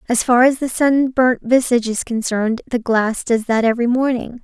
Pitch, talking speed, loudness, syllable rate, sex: 240 Hz, 205 wpm, -17 LUFS, 5.3 syllables/s, female